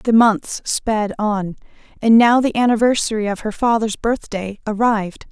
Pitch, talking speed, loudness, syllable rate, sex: 220 Hz, 145 wpm, -17 LUFS, 4.5 syllables/s, female